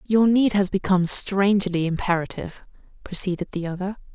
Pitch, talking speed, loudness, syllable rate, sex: 190 Hz, 130 wpm, -22 LUFS, 5.6 syllables/s, female